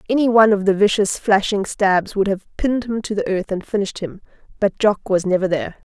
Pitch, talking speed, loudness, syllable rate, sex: 205 Hz, 225 wpm, -18 LUFS, 6.0 syllables/s, female